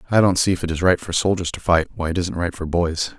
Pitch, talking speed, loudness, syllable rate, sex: 90 Hz, 320 wpm, -20 LUFS, 6.1 syllables/s, male